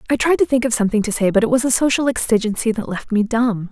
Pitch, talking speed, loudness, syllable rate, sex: 230 Hz, 290 wpm, -18 LUFS, 6.8 syllables/s, female